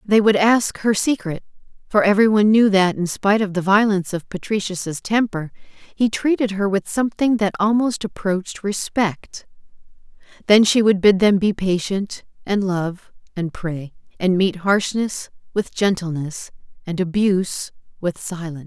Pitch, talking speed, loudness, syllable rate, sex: 195 Hz, 150 wpm, -19 LUFS, 4.6 syllables/s, female